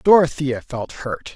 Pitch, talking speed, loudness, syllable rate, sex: 145 Hz, 135 wpm, -21 LUFS, 3.8 syllables/s, male